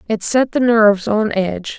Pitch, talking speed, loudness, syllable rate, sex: 210 Hz, 200 wpm, -15 LUFS, 5.0 syllables/s, female